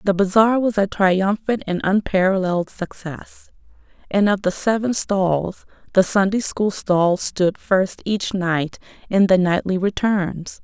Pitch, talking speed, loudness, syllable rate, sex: 195 Hz, 140 wpm, -19 LUFS, 3.9 syllables/s, female